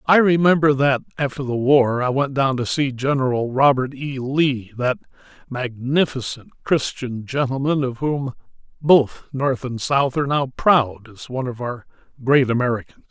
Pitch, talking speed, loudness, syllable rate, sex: 130 Hz, 155 wpm, -20 LUFS, 4.6 syllables/s, male